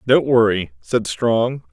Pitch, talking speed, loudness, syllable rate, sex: 115 Hz, 140 wpm, -18 LUFS, 3.4 syllables/s, male